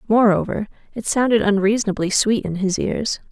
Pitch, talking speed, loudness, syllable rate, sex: 210 Hz, 145 wpm, -19 LUFS, 5.4 syllables/s, female